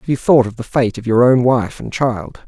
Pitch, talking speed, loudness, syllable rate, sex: 120 Hz, 290 wpm, -15 LUFS, 4.9 syllables/s, male